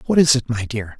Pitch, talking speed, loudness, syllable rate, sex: 125 Hz, 300 wpm, -18 LUFS, 6.0 syllables/s, male